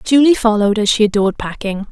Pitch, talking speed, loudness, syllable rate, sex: 220 Hz, 190 wpm, -14 LUFS, 6.7 syllables/s, female